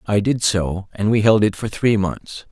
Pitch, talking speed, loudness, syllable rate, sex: 105 Hz, 240 wpm, -18 LUFS, 4.3 syllables/s, male